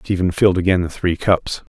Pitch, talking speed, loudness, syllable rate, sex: 90 Hz, 205 wpm, -18 LUFS, 5.5 syllables/s, male